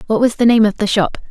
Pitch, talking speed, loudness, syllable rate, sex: 215 Hz, 320 wpm, -14 LUFS, 6.5 syllables/s, female